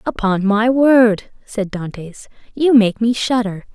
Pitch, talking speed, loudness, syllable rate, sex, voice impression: 220 Hz, 145 wpm, -16 LUFS, 3.8 syllables/s, female, feminine, adult-like, tensed, powerful, bright, slightly muffled, fluent, intellectual, friendly, lively, slightly sharp